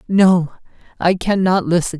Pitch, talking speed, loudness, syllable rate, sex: 180 Hz, 120 wpm, -16 LUFS, 4.3 syllables/s, female